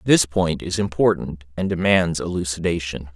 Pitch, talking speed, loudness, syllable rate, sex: 85 Hz, 135 wpm, -21 LUFS, 4.9 syllables/s, male